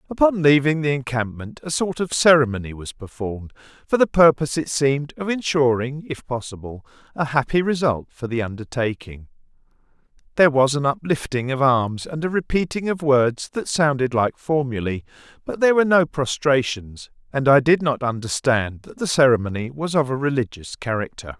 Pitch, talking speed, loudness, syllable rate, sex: 140 Hz, 165 wpm, -20 LUFS, 5.3 syllables/s, male